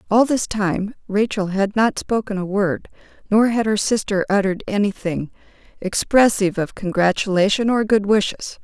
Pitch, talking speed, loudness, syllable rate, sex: 205 Hz, 145 wpm, -19 LUFS, 4.9 syllables/s, female